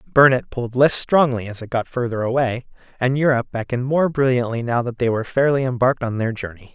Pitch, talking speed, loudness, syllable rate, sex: 125 Hz, 205 wpm, -20 LUFS, 6.4 syllables/s, male